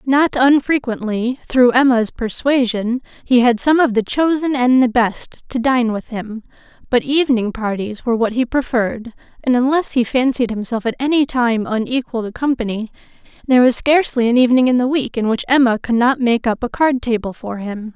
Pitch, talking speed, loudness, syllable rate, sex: 245 Hz, 185 wpm, -16 LUFS, 5.2 syllables/s, female